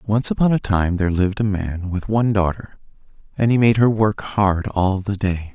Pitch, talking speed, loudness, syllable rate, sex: 100 Hz, 215 wpm, -19 LUFS, 5.1 syllables/s, male